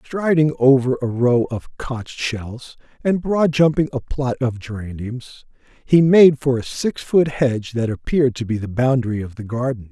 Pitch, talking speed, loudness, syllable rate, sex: 130 Hz, 180 wpm, -19 LUFS, 4.5 syllables/s, male